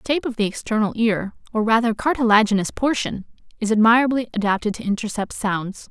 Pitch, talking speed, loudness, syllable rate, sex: 220 Hz, 160 wpm, -20 LUFS, 6.3 syllables/s, female